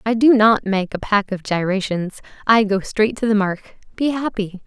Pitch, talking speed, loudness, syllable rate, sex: 210 Hz, 205 wpm, -18 LUFS, 4.6 syllables/s, female